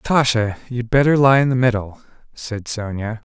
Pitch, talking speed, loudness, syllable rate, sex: 120 Hz, 165 wpm, -18 LUFS, 5.1 syllables/s, male